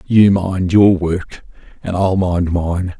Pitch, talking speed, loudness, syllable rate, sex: 90 Hz, 160 wpm, -15 LUFS, 3.2 syllables/s, male